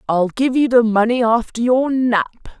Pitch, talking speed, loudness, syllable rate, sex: 235 Hz, 185 wpm, -16 LUFS, 4.6 syllables/s, female